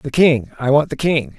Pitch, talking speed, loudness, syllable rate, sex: 145 Hz, 215 wpm, -17 LUFS, 4.9 syllables/s, male